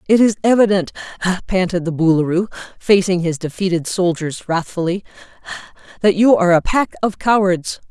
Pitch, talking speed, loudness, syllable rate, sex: 185 Hz, 135 wpm, -17 LUFS, 5.5 syllables/s, female